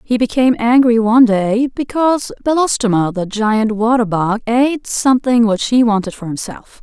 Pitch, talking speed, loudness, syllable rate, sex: 230 Hz, 160 wpm, -14 LUFS, 5.0 syllables/s, female